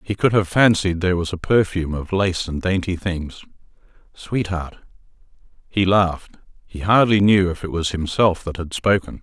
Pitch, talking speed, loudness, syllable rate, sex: 95 Hz, 165 wpm, -19 LUFS, 5.0 syllables/s, male